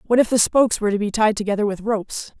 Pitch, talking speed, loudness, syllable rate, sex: 215 Hz, 275 wpm, -19 LUFS, 7.4 syllables/s, female